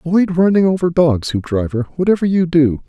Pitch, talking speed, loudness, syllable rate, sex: 160 Hz, 165 wpm, -15 LUFS, 5.5 syllables/s, male